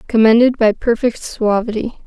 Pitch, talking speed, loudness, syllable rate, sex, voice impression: 225 Hz, 115 wpm, -15 LUFS, 5.4 syllables/s, female, feminine, adult-like, slightly relaxed, soft, raspy, intellectual, calm, friendly, reassuring, slightly kind, modest